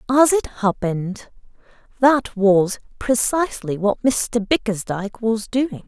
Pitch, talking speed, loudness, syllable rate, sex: 225 Hz, 110 wpm, -20 LUFS, 4.1 syllables/s, female